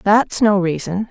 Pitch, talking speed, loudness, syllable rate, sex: 195 Hz, 160 wpm, -17 LUFS, 4.0 syllables/s, female